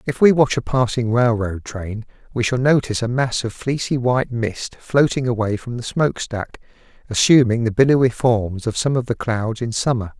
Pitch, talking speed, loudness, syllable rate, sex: 120 Hz, 190 wpm, -19 LUFS, 5.1 syllables/s, male